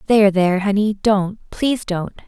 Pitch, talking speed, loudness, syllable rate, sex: 200 Hz, 160 wpm, -18 LUFS, 4.9 syllables/s, female